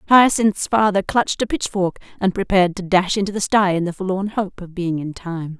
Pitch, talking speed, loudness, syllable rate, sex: 190 Hz, 215 wpm, -19 LUFS, 5.4 syllables/s, female